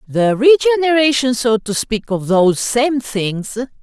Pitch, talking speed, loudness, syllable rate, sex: 245 Hz, 140 wpm, -15 LUFS, 4.1 syllables/s, female